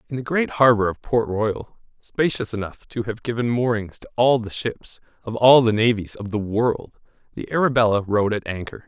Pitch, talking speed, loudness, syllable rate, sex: 115 Hz, 195 wpm, -21 LUFS, 5.0 syllables/s, male